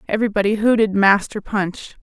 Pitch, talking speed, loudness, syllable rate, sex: 205 Hz, 120 wpm, -18 LUFS, 5.5 syllables/s, female